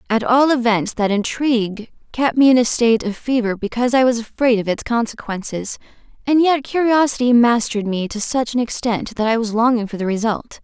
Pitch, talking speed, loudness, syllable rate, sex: 235 Hz, 195 wpm, -18 LUFS, 5.5 syllables/s, female